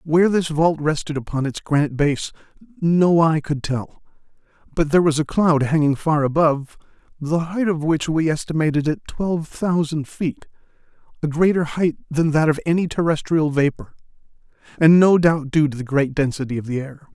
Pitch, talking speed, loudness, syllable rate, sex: 155 Hz, 175 wpm, -19 LUFS, 5.2 syllables/s, male